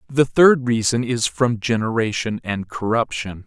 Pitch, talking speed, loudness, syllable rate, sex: 115 Hz, 140 wpm, -19 LUFS, 4.3 syllables/s, male